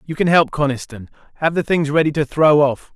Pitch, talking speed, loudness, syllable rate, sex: 150 Hz, 225 wpm, -17 LUFS, 5.6 syllables/s, male